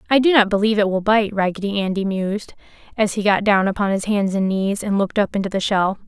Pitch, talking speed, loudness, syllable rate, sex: 200 Hz, 245 wpm, -19 LUFS, 6.3 syllables/s, female